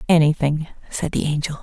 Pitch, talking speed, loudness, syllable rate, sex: 150 Hz, 145 wpm, -21 LUFS, 5.8 syllables/s, female